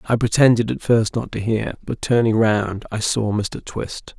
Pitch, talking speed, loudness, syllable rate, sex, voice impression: 110 Hz, 200 wpm, -20 LUFS, 4.4 syllables/s, male, masculine, middle-aged, powerful, slightly weak, fluent, slightly raspy, intellectual, mature, friendly, reassuring, wild, lively, slightly kind